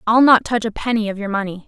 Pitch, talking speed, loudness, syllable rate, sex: 215 Hz, 285 wpm, -17 LUFS, 6.5 syllables/s, female